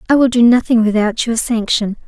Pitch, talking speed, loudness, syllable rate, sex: 230 Hz, 200 wpm, -14 LUFS, 5.5 syllables/s, female